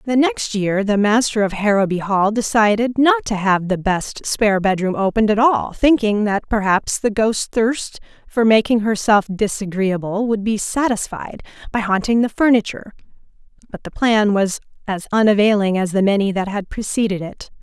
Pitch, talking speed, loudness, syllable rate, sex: 210 Hz, 165 wpm, -17 LUFS, 4.9 syllables/s, female